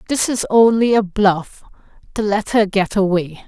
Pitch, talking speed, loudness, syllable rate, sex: 205 Hz, 175 wpm, -16 LUFS, 4.4 syllables/s, female